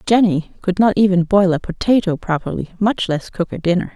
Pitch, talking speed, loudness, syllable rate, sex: 185 Hz, 195 wpm, -17 LUFS, 5.5 syllables/s, female